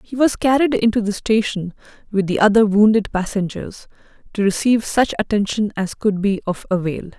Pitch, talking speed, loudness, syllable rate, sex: 210 Hz, 165 wpm, -18 LUFS, 5.4 syllables/s, female